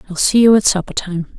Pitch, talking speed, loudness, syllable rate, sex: 195 Hz, 260 wpm, -14 LUFS, 5.9 syllables/s, female